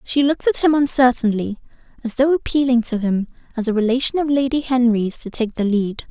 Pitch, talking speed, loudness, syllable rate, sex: 245 Hz, 195 wpm, -19 LUFS, 5.7 syllables/s, female